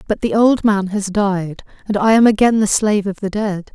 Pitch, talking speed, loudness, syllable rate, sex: 205 Hz, 240 wpm, -16 LUFS, 5.1 syllables/s, female